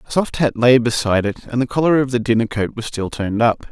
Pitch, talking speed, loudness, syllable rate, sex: 120 Hz, 275 wpm, -18 LUFS, 6.4 syllables/s, male